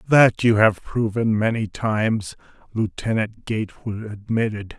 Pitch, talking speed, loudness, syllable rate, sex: 110 Hz, 115 wpm, -21 LUFS, 4.3 syllables/s, male